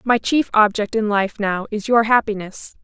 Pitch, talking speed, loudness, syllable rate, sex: 215 Hz, 190 wpm, -18 LUFS, 4.6 syllables/s, female